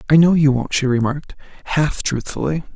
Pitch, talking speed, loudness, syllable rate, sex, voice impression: 145 Hz, 175 wpm, -18 LUFS, 5.5 syllables/s, male, very masculine, middle-aged, thick, very relaxed, very weak, dark, very soft, very muffled, slightly fluent, very raspy, slightly cool, intellectual, very sincere, very calm, very mature, friendly, slightly reassuring, very unique, elegant, slightly wild, very sweet, very kind, very modest